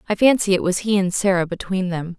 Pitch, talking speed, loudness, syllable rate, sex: 190 Hz, 245 wpm, -19 LUFS, 6.0 syllables/s, female